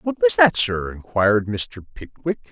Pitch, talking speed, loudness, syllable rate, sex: 140 Hz, 165 wpm, -20 LUFS, 4.2 syllables/s, male